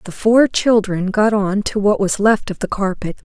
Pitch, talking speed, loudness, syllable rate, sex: 205 Hz, 215 wpm, -16 LUFS, 4.5 syllables/s, female